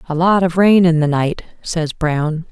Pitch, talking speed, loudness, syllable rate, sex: 165 Hz, 215 wpm, -15 LUFS, 4.3 syllables/s, female